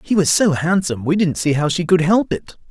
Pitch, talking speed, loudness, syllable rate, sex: 170 Hz, 265 wpm, -17 LUFS, 5.6 syllables/s, male